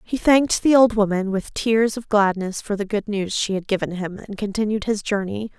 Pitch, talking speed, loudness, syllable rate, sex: 205 Hz, 225 wpm, -21 LUFS, 5.2 syllables/s, female